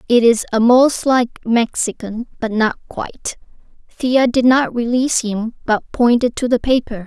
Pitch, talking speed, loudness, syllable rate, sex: 240 Hz, 160 wpm, -16 LUFS, 4.4 syllables/s, female